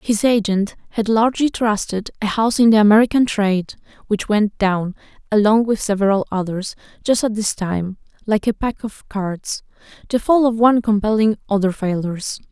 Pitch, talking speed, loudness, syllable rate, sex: 210 Hz, 165 wpm, -18 LUFS, 5.2 syllables/s, female